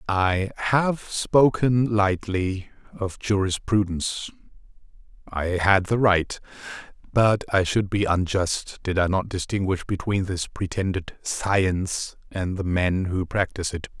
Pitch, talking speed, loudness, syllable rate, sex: 95 Hz, 125 wpm, -24 LUFS, 3.9 syllables/s, male